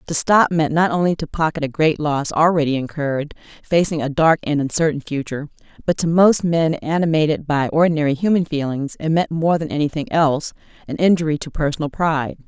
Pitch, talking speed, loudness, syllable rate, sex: 155 Hz, 185 wpm, -19 LUFS, 5.8 syllables/s, female